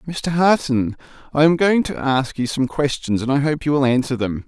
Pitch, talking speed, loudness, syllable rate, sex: 140 Hz, 230 wpm, -19 LUFS, 5.1 syllables/s, male